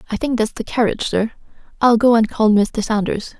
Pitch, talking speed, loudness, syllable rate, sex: 225 Hz, 210 wpm, -17 LUFS, 5.6 syllables/s, female